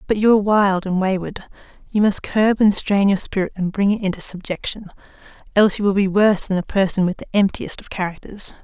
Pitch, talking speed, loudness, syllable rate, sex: 195 Hz, 215 wpm, -19 LUFS, 5.9 syllables/s, female